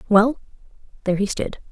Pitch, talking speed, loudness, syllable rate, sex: 210 Hz, 140 wpm, -22 LUFS, 6.3 syllables/s, female